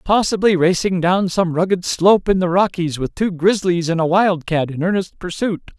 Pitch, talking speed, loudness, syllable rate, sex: 180 Hz, 185 wpm, -17 LUFS, 5.0 syllables/s, male